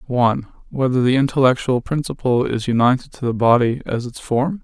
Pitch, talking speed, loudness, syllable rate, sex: 125 Hz, 170 wpm, -18 LUFS, 5.8 syllables/s, male